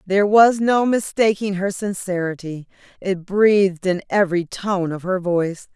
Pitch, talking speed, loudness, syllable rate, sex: 190 Hz, 135 wpm, -19 LUFS, 4.6 syllables/s, female